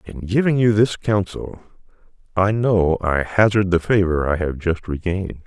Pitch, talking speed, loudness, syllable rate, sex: 95 Hz, 165 wpm, -19 LUFS, 4.7 syllables/s, male